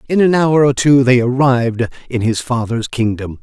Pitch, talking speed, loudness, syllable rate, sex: 125 Hz, 195 wpm, -14 LUFS, 5.0 syllables/s, male